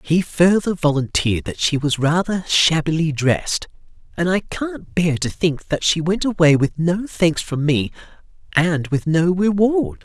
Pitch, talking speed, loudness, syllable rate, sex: 160 Hz, 165 wpm, -19 LUFS, 4.3 syllables/s, male